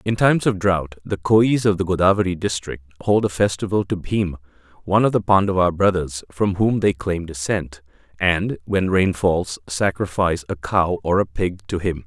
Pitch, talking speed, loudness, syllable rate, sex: 90 Hz, 185 wpm, -20 LUFS, 5.0 syllables/s, male